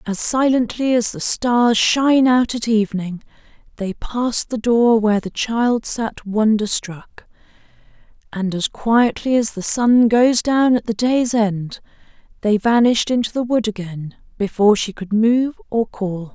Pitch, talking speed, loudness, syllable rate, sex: 225 Hz, 160 wpm, -18 LUFS, 4.2 syllables/s, female